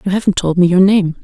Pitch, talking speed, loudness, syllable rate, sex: 185 Hz, 290 wpm, -12 LUFS, 6.4 syllables/s, female